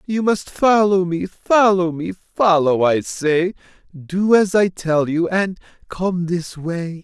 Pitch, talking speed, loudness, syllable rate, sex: 180 Hz, 155 wpm, -18 LUFS, 3.4 syllables/s, male